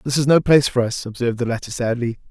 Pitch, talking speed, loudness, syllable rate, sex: 125 Hz, 260 wpm, -19 LUFS, 7.2 syllables/s, male